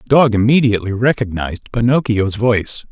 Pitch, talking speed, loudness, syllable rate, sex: 115 Hz, 125 wpm, -15 LUFS, 5.7 syllables/s, male